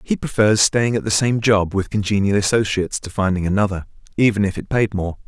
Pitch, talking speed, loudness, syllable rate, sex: 105 Hz, 205 wpm, -18 LUFS, 5.8 syllables/s, male